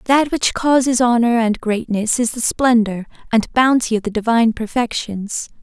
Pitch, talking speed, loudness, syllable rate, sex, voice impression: 230 Hz, 160 wpm, -17 LUFS, 4.7 syllables/s, female, feminine, adult-like, relaxed, soft, fluent, slightly cute, calm, friendly, reassuring, elegant, lively, kind